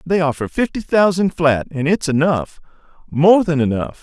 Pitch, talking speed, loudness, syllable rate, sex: 160 Hz, 150 wpm, -17 LUFS, 4.7 syllables/s, male